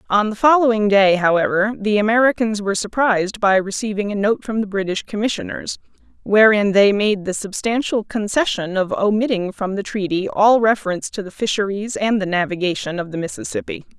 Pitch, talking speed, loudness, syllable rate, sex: 205 Hz, 165 wpm, -18 LUFS, 5.6 syllables/s, female